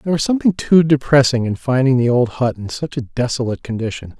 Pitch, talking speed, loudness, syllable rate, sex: 130 Hz, 215 wpm, -17 LUFS, 6.3 syllables/s, male